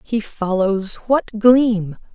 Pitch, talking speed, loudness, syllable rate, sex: 215 Hz, 110 wpm, -18 LUFS, 2.6 syllables/s, female